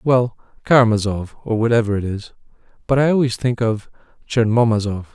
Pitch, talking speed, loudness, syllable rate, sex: 115 Hz, 140 wpm, -18 LUFS, 5.5 syllables/s, male